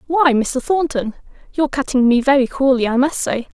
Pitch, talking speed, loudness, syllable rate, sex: 270 Hz, 185 wpm, -17 LUFS, 5.4 syllables/s, female